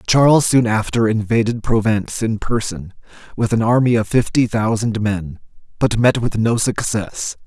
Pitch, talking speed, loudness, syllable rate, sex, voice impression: 115 Hz, 155 wpm, -17 LUFS, 4.7 syllables/s, male, masculine, adult-like, slightly muffled, refreshing, slightly sincere, slightly sweet